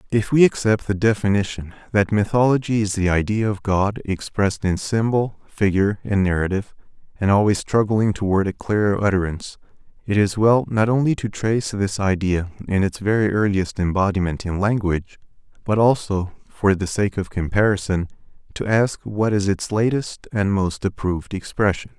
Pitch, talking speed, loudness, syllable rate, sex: 100 Hz, 160 wpm, -20 LUFS, 5.2 syllables/s, male